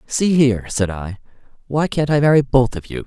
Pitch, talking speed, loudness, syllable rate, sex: 130 Hz, 215 wpm, -17 LUFS, 5.3 syllables/s, male